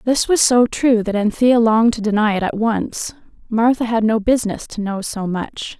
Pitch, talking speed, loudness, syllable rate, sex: 225 Hz, 205 wpm, -17 LUFS, 4.9 syllables/s, female